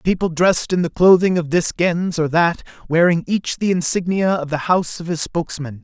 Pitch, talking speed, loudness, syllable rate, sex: 170 Hz, 205 wpm, -18 LUFS, 5.4 syllables/s, male